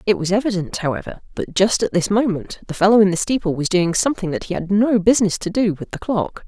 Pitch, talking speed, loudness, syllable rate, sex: 195 Hz, 250 wpm, -19 LUFS, 6.3 syllables/s, female